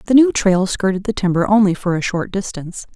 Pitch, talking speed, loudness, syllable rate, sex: 195 Hz, 225 wpm, -17 LUFS, 5.9 syllables/s, female